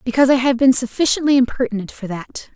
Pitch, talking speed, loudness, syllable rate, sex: 250 Hz, 190 wpm, -17 LUFS, 6.6 syllables/s, female